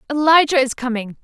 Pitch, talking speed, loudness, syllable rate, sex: 270 Hz, 145 wpm, -16 LUFS, 5.9 syllables/s, female